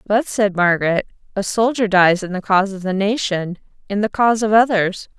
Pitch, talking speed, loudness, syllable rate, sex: 200 Hz, 185 wpm, -17 LUFS, 5.4 syllables/s, female